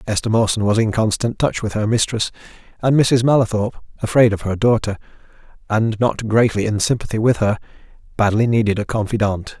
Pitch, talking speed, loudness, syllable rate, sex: 110 Hz, 170 wpm, -18 LUFS, 5.9 syllables/s, male